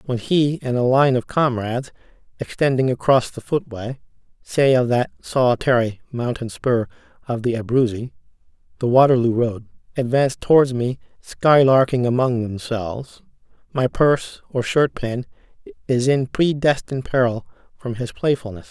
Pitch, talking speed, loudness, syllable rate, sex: 125 Hz, 125 wpm, -20 LUFS, 4.8 syllables/s, male